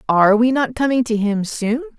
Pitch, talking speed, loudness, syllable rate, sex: 235 Hz, 210 wpm, -17 LUFS, 5.3 syllables/s, female